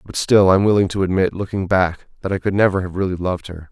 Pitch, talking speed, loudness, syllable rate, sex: 95 Hz, 275 wpm, -18 LUFS, 6.7 syllables/s, male